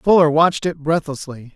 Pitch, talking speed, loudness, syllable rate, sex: 155 Hz, 155 wpm, -17 LUFS, 5.3 syllables/s, male